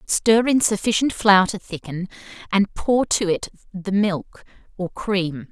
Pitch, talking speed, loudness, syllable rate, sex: 195 Hz, 150 wpm, -20 LUFS, 3.9 syllables/s, female